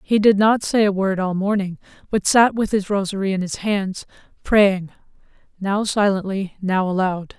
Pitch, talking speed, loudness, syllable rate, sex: 200 Hz, 170 wpm, -19 LUFS, 4.6 syllables/s, female